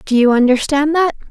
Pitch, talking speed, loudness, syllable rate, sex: 280 Hz, 185 wpm, -14 LUFS, 5.6 syllables/s, female